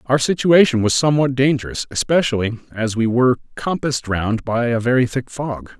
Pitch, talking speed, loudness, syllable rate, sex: 125 Hz, 165 wpm, -18 LUFS, 5.6 syllables/s, male